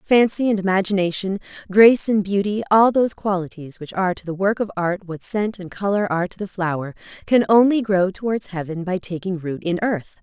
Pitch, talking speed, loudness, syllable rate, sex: 195 Hz, 200 wpm, -20 LUFS, 5.6 syllables/s, female